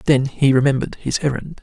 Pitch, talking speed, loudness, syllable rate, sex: 140 Hz, 185 wpm, -18 LUFS, 6.1 syllables/s, male